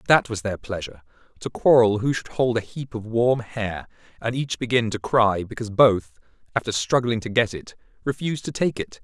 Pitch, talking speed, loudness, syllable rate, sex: 115 Hz, 200 wpm, -23 LUFS, 5.4 syllables/s, male